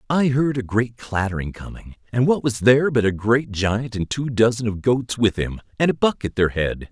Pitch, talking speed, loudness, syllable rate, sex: 115 Hz, 235 wpm, -21 LUFS, 5.0 syllables/s, male